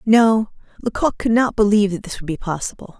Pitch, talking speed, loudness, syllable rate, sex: 210 Hz, 200 wpm, -19 LUFS, 5.8 syllables/s, female